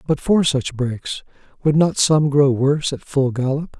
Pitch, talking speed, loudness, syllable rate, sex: 140 Hz, 190 wpm, -18 LUFS, 4.3 syllables/s, male